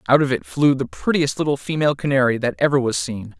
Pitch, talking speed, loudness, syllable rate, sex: 135 Hz, 230 wpm, -20 LUFS, 6.3 syllables/s, male